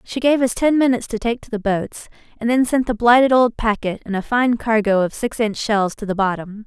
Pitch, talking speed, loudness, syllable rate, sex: 225 Hz, 245 wpm, -18 LUFS, 5.5 syllables/s, female